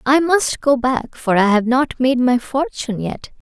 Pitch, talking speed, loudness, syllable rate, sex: 255 Hz, 205 wpm, -17 LUFS, 4.4 syllables/s, female